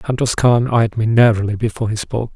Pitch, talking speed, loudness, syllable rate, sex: 115 Hz, 205 wpm, -16 LUFS, 6.1 syllables/s, male